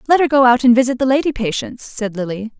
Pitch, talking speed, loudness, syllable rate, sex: 245 Hz, 255 wpm, -16 LUFS, 5.9 syllables/s, female